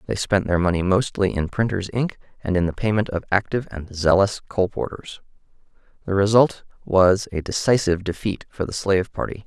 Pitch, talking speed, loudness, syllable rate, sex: 100 Hz, 170 wpm, -21 LUFS, 5.5 syllables/s, male